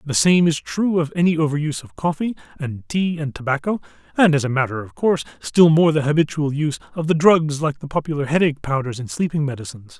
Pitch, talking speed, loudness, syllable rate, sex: 155 Hz, 210 wpm, -20 LUFS, 6.2 syllables/s, male